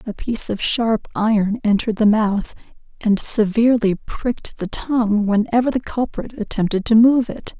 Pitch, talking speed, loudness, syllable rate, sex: 220 Hz, 160 wpm, -18 LUFS, 4.9 syllables/s, female